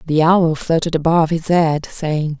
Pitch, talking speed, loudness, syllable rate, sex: 160 Hz, 175 wpm, -16 LUFS, 5.0 syllables/s, female